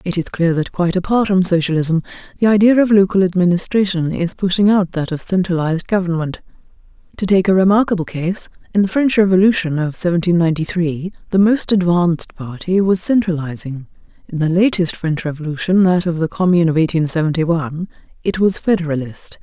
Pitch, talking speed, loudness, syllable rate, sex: 175 Hz, 170 wpm, -16 LUFS, 5.9 syllables/s, female